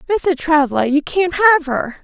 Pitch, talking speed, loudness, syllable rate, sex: 310 Hz, 175 wpm, -15 LUFS, 4.3 syllables/s, female